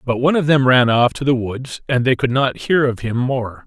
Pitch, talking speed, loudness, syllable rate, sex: 130 Hz, 280 wpm, -17 LUFS, 5.1 syllables/s, male